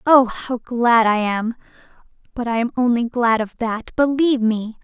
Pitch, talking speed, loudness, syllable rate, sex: 235 Hz, 175 wpm, -19 LUFS, 4.5 syllables/s, female